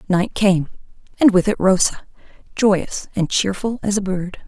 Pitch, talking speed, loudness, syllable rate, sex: 195 Hz, 160 wpm, -18 LUFS, 4.4 syllables/s, female